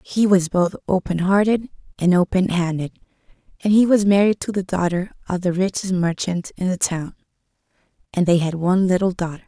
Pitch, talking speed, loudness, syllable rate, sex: 185 Hz, 175 wpm, -20 LUFS, 5.5 syllables/s, female